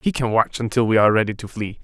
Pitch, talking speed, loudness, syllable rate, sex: 110 Hz, 295 wpm, -19 LUFS, 7.0 syllables/s, male